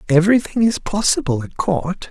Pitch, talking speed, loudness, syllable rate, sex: 180 Hz, 145 wpm, -18 LUFS, 5.2 syllables/s, male